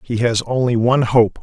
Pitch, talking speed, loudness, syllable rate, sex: 120 Hz, 210 wpm, -16 LUFS, 5.4 syllables/s, male